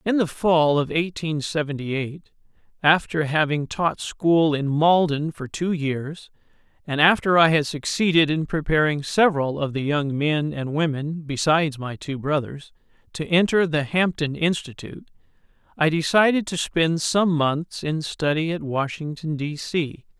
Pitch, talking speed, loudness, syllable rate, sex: 155 Hz, 150 wpm, -22 LUFS, 4.4 syllables/s, male